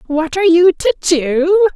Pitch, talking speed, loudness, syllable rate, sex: 330 Hz, 170 wpm, -13 LUFS, 4.3 syllables/s, male